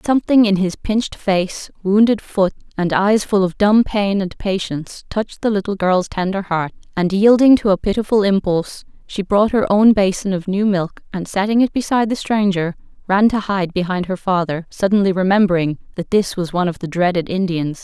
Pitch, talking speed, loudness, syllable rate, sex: 195 Hz, 190 wpm, -17 LUFS, 5.3 syllables/s, female